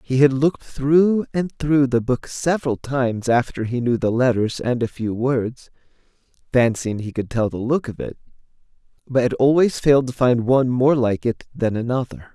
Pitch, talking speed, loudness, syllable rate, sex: 125 Hz, 190 wpm, -20 LUFS, 4.9 syllables/s, male